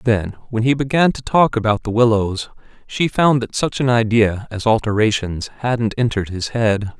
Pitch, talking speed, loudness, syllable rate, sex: 115 Hz, 180 wpm, -18 LUFS, 4.7 syllables/s, male